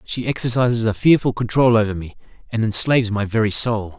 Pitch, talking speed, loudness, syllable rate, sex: 110 Hz, 180 wpm, -18 LUFS, 5.9 syllables/s, male